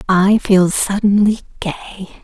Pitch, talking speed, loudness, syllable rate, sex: 195 Hz, 105 wpm, -15 LUFS, 4.2 syllables/s, female